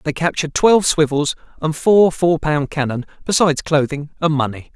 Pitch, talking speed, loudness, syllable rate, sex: 155 Hz, 165 wpm, -17 LUFS, 5.6 syllables/s, male